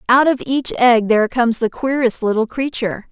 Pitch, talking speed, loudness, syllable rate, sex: 240 Hz, 195 wpm, -16 LUFS, 5.5 syllables/s, female